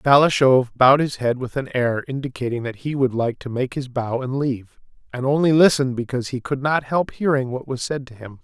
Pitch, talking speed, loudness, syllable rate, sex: 130 Hz, 230 wpm, -20 LUFS, 5.7 syllables/s, male